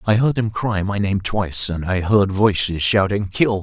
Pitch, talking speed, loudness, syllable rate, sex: 100 Hz, 215 wpm, -19 LUFS, 4.6 syllables/s, male